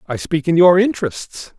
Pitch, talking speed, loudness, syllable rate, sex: 165 Hz, 190 wpm, -15 LUFS, 4.8 syllables/s, male